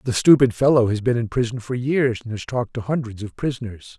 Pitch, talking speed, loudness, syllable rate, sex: 120 Hz, 240 wpm, -20 LUFS, 6.0 syllables/s, male